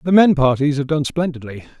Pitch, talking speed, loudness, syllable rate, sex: 145 Hz, 200 wpm, -17 LUFS, 5.8 syllables/s, male